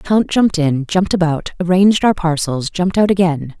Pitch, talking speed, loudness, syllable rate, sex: 175 Hz, 200 wpm, -15 LUFS, 5.8 syllables/s, female